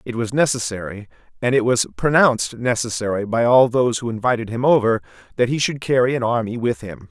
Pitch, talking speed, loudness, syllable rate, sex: 115 Hz, 195 wpm, -19 LUFS, 6.0 syllables/s, male